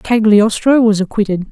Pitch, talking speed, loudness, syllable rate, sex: 215 Hz, 120 wpm, -12 LUFS, 4.8 syllables/s, female